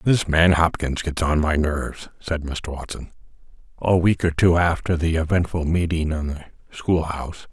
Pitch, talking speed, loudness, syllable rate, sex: 80 Hz, 175 wpm, -21 LUFS, 4.7 syllables/s, male